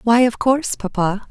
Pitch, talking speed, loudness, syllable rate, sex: 230 Hz, 185 wpm, -18 LUFS, 5.3 syllables/s, female